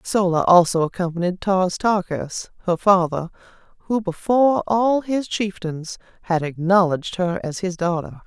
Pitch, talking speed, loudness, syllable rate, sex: 185 Hz, 130 wpm, -20 LUFS, 4.5 syllables/s, female